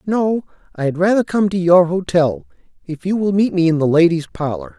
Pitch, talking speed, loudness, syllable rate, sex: 180 Hz, 215 wpm, -16 LUFS, 5.3 syllables/s, male